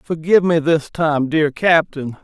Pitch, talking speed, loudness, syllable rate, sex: 155 Hz, 160 wpm, -16 LUFS, 4.2 syllables/s, male